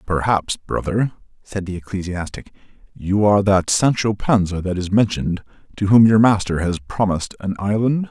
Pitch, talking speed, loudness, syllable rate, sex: 100 Hz, 155 wpm, -19 LUFS, 5.1 syllables/s, male